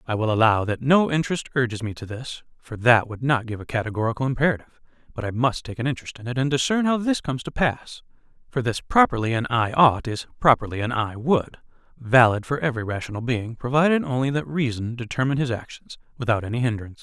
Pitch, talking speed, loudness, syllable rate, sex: 125 Hz, 210 wpm, -23 LUFS, 6.3 syllables/s, male